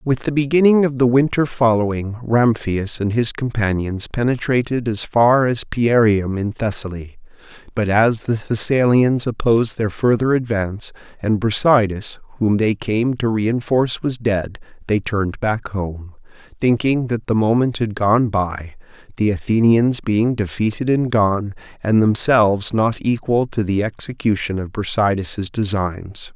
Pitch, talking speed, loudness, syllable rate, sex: 110 Hz, 140 wpm, -18 LUFS, 4.4 syllables/s, male